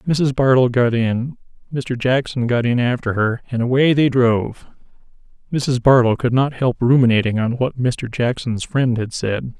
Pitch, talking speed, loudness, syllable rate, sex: 125 Hz, 170 wpm, -18 LUFS, 4.6 syllables/s, male